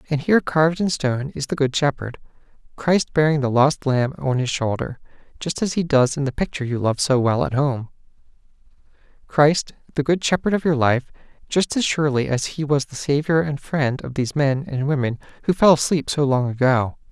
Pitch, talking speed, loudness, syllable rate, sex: 140 Hz, 205 wpm, -20 LUFS, 5.5 syllables/s, male